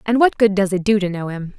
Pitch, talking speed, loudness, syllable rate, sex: 200 Hz, 340 wpm, -18 LUFS, 6.2 syllables/s, female